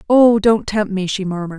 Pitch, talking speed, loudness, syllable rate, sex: 200 Hz, 225 wpm, -16 LUFS, 5.5 syllables/s, female